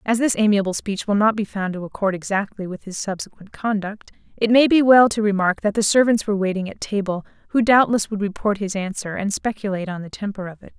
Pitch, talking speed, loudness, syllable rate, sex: 205 Hz, 230 wpm, -20 LUFS, 6.1 syllables/s, female